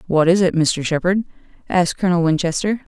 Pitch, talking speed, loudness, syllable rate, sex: 175 Hz, 165 wpm, -18 LUFS, 6.2 syllables/s, female